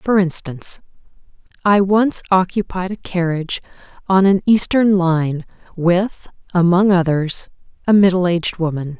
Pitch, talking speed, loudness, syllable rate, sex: 180 Hz, 120 wpm, -17 LUFS, 4.5 syllables/s, female